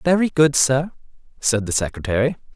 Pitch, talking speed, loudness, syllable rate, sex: 135 Hz, 140 wpm, -19 LUFS, 5.5 syllables/s, male